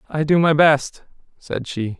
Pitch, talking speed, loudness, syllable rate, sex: 145 Hz, 180 wpm, -18 LUFS, 4.0 syllables/s, male